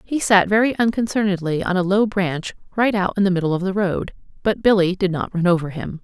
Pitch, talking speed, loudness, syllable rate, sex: 195 Hz, 230 wpm, -19 LUFS, 5.8 syllables/s, female